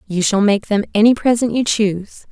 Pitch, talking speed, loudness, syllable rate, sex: 210 Hz, 205 wpm, -16 LUFS, 5.3 syllables/s, female